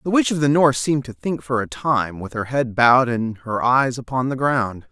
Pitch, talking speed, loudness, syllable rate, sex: 125 Hz, 255 wpm, -20 LUFS, 5.0 syllables/s, male